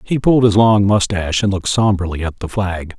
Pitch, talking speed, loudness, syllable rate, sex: 100 Hz, 220 wpm, -15 LUFS, 5.9 syllables/s, male